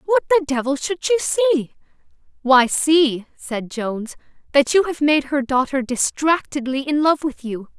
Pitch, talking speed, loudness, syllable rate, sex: 285 Hz, 160 wpm, -19 LUFS, 4.6 syllables/s, female